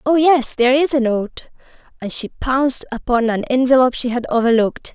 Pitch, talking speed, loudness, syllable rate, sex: 250 Hz, 180 wpm, -17 LUFS, 5.8 syllables/s, female